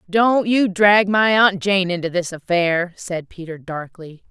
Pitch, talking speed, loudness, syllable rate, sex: 185 Hz, 165 wpm, -17 LUFS, 3.9 syllables/s, female